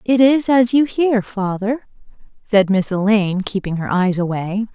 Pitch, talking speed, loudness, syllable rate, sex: 210 Hz, 165 wpm, -17 LUFS, 4.5 syllables/s, female